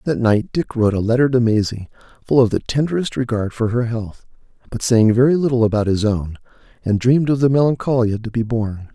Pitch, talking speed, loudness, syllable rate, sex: 120 Hz, 210 wpm, -18 LUFS, 5.8 syllables/s, male